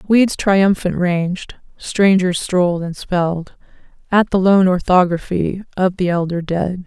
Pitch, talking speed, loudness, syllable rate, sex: 185 Hz, 130 wpm, -16 LUFS, 4.1 syllables/s, female